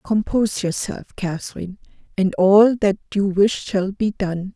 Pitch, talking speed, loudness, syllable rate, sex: 195 Hz, 145 wpm, -20 LUFS, 4.3 syllables/s, female